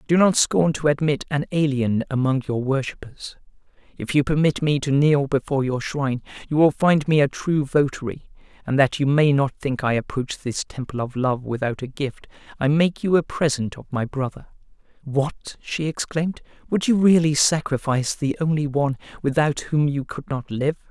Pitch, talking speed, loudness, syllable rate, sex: 140 Hz, 185 wpm, -22 LUFS, 5.1 syllables/s, male